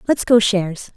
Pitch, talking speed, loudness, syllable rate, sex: 205 Hz, 190 wpm, -16 LUFS, 5.1 syllables/s, female